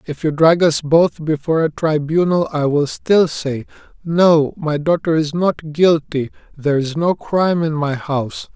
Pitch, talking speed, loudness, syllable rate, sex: 155 Hz, 170 wpm, -17 LUFS, 4.4 syllables/s, male